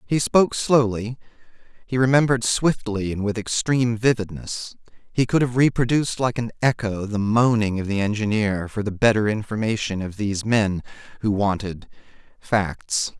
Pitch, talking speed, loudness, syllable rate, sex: 110 Hz, 145 wpm, -22 LUFS, 5.0 syllables/s, male